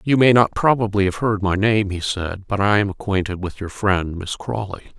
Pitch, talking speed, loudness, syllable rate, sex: 100 Hz, 230 wpm, -20 LUFS, 5.1 syllables/s, male